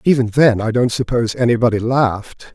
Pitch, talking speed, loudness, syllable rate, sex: 120 Hz, 165 wpm, -16 LUFS, 5.8 syllables/s, male